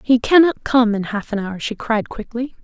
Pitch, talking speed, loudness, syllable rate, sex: 235 Hz, 225 wpm, -18 LUFS, 4.8 syllables/s, female